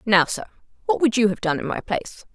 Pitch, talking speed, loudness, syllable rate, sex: 200 Hz, 255 wpm, -22 LUFS, 6.3 syllables/s, female